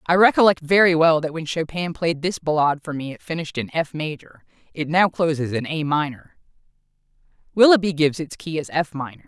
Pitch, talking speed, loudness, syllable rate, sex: 160 Hz, 195 wpm, -20 LUFS, 5.9 syllables/s, female